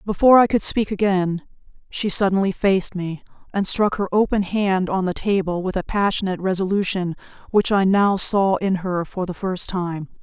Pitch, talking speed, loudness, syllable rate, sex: 190 Hz, 180 wpm, -20 LUFS, 5.1 syllables/s, female